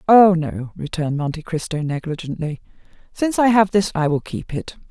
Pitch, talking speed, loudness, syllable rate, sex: 170 Hz, 170 wpm, -20 LUFS, 5.5 syllables/s, female